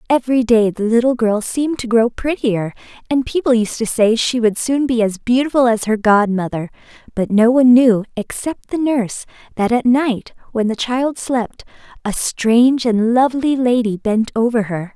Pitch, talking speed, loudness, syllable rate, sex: 235 Hz, 180 wpm, -16 LUFS, 4.9 syllables/s, female